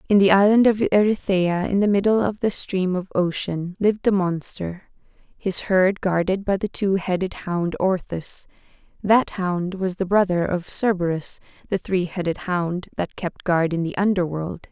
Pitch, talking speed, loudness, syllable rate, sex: 185 Hz, 165 wpm, -22 LUFS, 4.5 syllables/s, female